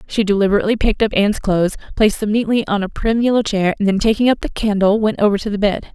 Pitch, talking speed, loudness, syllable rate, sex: 205 Hz, 250 wpm, -17 LUFS, 7.2 syllables/s, female